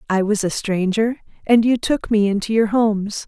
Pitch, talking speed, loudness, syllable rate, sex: 215 Hz, 200 wpm, -18 LUFS, 5.0 syllables/s, female